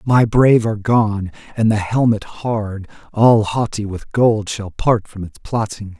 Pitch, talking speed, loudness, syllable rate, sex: 110 Hz, 170 wpm, -17 LUFS, 4.1 syllables/s, male